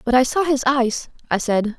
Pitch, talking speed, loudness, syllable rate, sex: 250 Hz, 235 wpm, -20 LUFS, 4.8 syllables/s, female